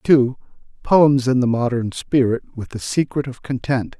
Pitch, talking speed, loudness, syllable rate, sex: 125 Hz, 165 wpm, -19 LUFS, 5.1 syllables/s, male